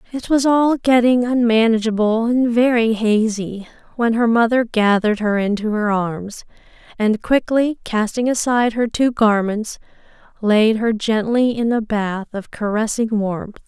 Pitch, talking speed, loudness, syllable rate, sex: 225 Hz, 140 wpm, -17 LUFS, 4.4 syllables/s, female